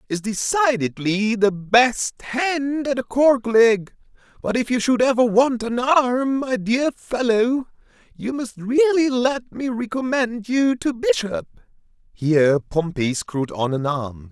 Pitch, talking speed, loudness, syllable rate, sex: 225 Hz, 145 wpm, -20 LUFS, 3.8 syllables/s, male